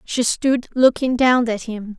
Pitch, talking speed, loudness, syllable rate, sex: 240 Hz, 180 wpm, -18 LUFS, 3.9 syllables/s, female